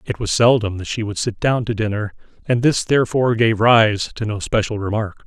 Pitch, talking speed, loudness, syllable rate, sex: 110 Hz, 215 wpm, -18 LUFS, 5.4 syllables/s, male